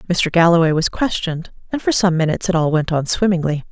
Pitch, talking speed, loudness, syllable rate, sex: 170 Hz, 210 wpm, -17 LUFS, 6.3 syllables/s, female